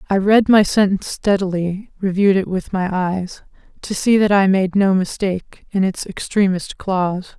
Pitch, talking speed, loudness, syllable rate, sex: 190 Hz, 170 wpm, -18 LUFS, 4.8 syllables/s, female